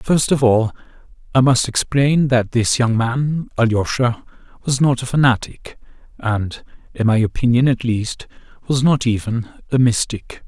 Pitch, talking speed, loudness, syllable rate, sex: 125 Hz, 150 wpm, -17 LUFS, 4.4 syllables/s, male